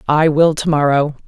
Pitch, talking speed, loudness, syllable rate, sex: 150 Hz, 190 wpm, -14 LUFS, 4.9 syllables/s, female